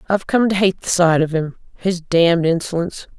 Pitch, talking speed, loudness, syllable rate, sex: 175 Hz, 190 wpm, -17 LUFS, 5.8 syllables/s, female